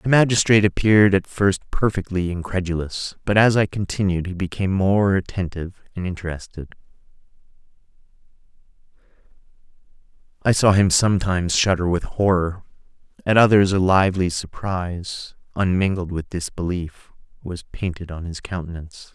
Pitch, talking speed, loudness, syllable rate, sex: 95 Hz, 115 wpm, -20 LUFS, 5.4 syllables/s, male